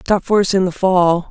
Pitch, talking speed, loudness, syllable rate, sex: 185 Hz, 275 wpm, -15 LUFS, 4.7 syllables/s, male